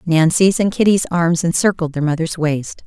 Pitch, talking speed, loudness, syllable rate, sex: 170 Hz, 170 wpm, -16 LUFS, 4.7 syllables/s, female